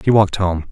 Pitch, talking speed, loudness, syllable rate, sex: 95 Hz, 255 wpm, -16 LUFS, 6.6 syllables/s, male